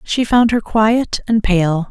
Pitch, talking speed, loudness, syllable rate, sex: 215 Hz, 190 wpm, -15 LUFS, 3.4 syllables/s, female